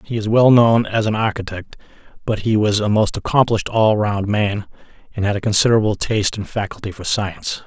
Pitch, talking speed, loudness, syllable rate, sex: 105 Hz, 195 wpm, -18 LUFS, 5.7 syllables/s, male